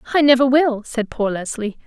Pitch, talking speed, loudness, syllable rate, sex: 250 Hz, 195 wpm, -18 LUFS, 5.4 syllables/s, female